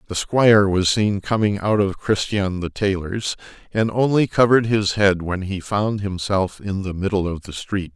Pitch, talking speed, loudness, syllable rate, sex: 100 Hz, 190 wpm, -20 LUFS, 4.6 syllables/s, male